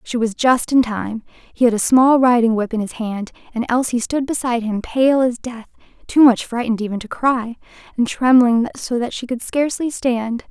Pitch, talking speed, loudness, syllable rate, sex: 240 Hz, 205 wpm, -18 LUFS, 5.0 syllables/s, female